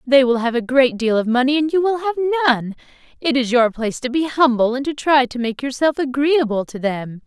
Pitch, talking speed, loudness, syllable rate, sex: 265 Hz, 240 wpm, -18 LUFS, 5.5 syllables/s, female